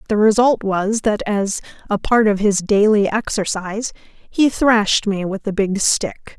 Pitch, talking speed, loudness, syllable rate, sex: 210 Hz, 170 wpm, -17 LUFS, 4.1 syllables/s, female